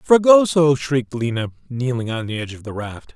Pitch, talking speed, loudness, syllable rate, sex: 130 Hz, 190 wpm, -19 LUFS, 5.5 syllables/s, male